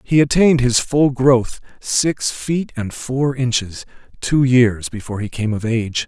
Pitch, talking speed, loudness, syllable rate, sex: 125 Hz, 170 wpm, -17 LUFS, 4.3 syllables/s, male